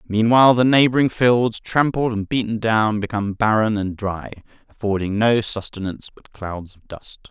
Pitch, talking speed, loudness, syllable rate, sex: 110 Hz, 155 wpm, -19 LUFS, 4.9 syllables/s, male